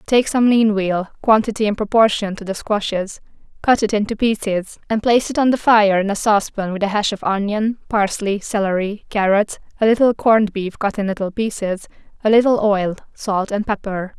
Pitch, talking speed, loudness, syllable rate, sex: 210 Hz, 190 wpm, -18 LUFS, 4.6 syllables/s, female